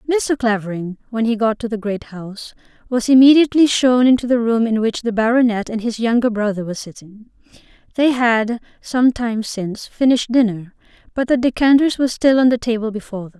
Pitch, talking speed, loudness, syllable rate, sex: 230 Hz, 190 wpm, -17 LUFS, 5.9 syllables/s, female